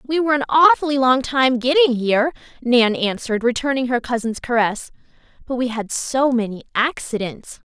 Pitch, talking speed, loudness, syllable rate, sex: 255 Hz, 155 wpm, -18 LUFS, 5.3 syllables/s, female